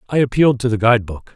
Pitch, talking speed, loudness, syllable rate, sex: 120 Hz, 265 wpm, -16 LUFS, 7.7 syllables/s, male